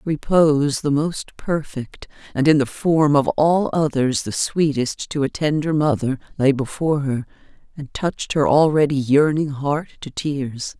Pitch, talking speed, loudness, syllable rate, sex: 145 Hz, 155 wpm, -19 LUFS, 4.3 syllables/s, female